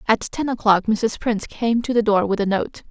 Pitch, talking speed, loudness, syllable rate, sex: 220 Hz, 250 wpm, -20 LUFS, 5.2 syllables/s, female